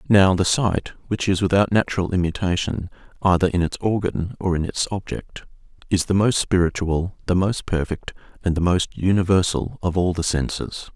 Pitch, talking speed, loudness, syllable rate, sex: 90 Hz, 170 wpm, -21 LUFS, 5.1 syllables/s, male